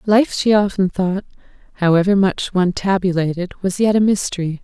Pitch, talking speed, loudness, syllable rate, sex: 190 Hz, 155 wpm, -17 LUFS, 5.3 syllables/s, female